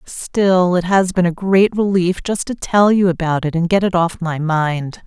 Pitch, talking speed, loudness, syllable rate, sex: 180 Hz, 225 wpm, -16 LUFS, 4.2 syllables/s, female